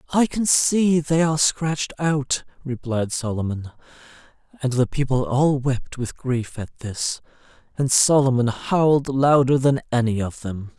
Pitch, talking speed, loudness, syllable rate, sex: 135 Hz, 145 wpm, -21 LUFS, 4.2 syllables/s, male